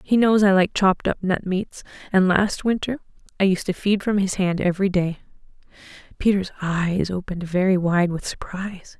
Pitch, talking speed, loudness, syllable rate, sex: 190 Hz, 180 wpm, -21 LUFS, 5.3 syllables/s, female